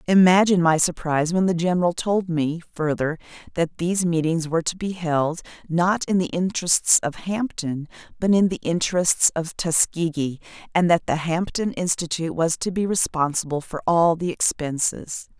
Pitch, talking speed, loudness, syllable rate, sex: 170 Hz, 160 wpm, -22 LUFS, 5.0 syllables/s, female